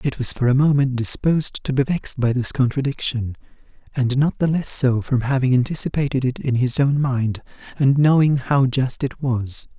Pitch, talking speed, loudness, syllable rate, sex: 130 Hz, 190 wpm, -20 LUFS, 5.0 syllables/s, male